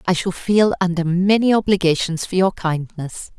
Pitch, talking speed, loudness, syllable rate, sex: 180 Hz, 160 wpm, -18 LUFS, 4.8 syllables/s, female